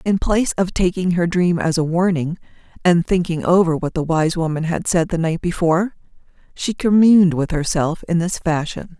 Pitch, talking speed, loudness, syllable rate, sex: 170 Hz, 185 wpm, -18 LUFS, 5.1 syllables/s, female